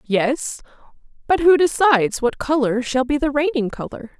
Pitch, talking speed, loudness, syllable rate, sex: 270 Hz, 155 wpm, -18 LUFS, 4.7 syllables/s, female